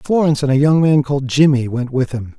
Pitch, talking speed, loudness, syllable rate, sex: 140 Hz, 275 wpm, -15 LUFS, 6.4 syllables/s, male